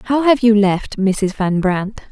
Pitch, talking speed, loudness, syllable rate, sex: 210 Hz, 200 wpm, -16 LUFS, 3.5 syllables/s, female